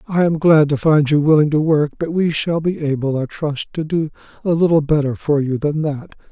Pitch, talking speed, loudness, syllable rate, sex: 150 Hz, 240 wpm, -17 LUFS, 5.2 syllables/s, male